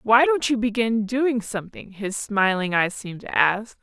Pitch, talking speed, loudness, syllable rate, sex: 220 Hz, 190 wpm, -22 LUFS, 4.5 syllables/s, female